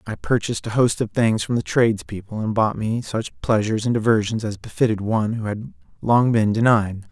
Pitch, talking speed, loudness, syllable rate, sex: 110 Hz, 200 wpm, -21 LUFS, 5.6 syllables/s, male